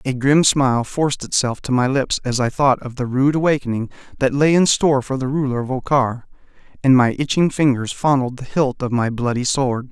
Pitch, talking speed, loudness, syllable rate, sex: 130 Hz, 210 wpm, -18 LUFS, 5.4 syllables/s, male